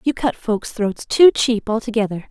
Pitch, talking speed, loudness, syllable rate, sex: 225 Hz, 180 wpm, -18 LUFS, 4.6 syllables/s, female